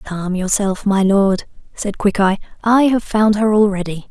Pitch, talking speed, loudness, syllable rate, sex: 200 Hz, 160 wpm, -16 LUFS, 4.3 syllables/s, female